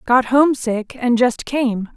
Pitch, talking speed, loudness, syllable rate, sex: 245 Hz, 155 wpm, -17 LUFS, 3.9 syllables/s, female